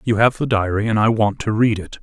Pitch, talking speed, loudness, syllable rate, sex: 110 Hz, 295 wpm, -18 LUFS, 5.7 syllables/s, male